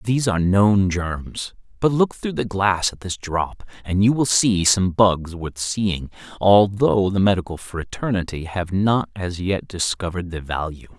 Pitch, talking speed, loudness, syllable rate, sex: 95 Hz, 170 wpm, -20 LUFS, 4.2 syllables/s, male